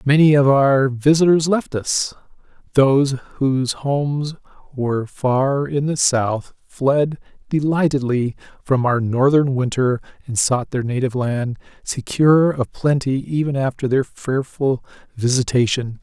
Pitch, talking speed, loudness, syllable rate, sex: 135 Hz, 125 wpm, -19 LUFS, 4.2 syllables/s, male